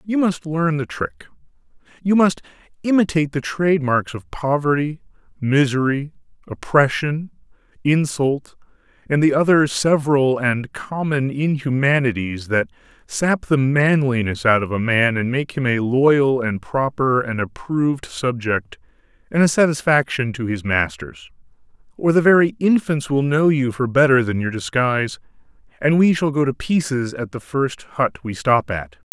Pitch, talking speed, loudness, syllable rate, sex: 135 Hz, 145 wpm, -19 LUFS, 4.5 syllables/s, male